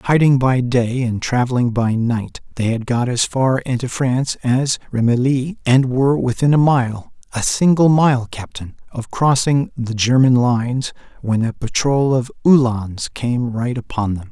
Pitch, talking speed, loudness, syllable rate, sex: 125 Hz, 155 wpm, -17 LUFS, 4.3 syllables/s, male